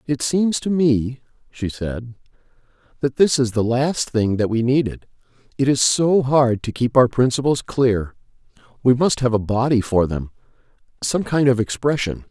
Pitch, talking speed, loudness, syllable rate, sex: 125 Hz, 160 wpm, -19 LUFS, 4.5 syllables/s, male